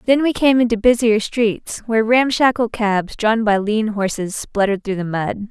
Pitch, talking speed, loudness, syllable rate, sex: 220 Hz, 185 wpm, -17 LUFS, 4.7 syllables/s, female